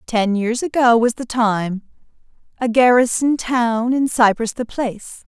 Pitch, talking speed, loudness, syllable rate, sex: 235 Hz, 145 wpm, -17 LUFS, 4.1 syllables/s, female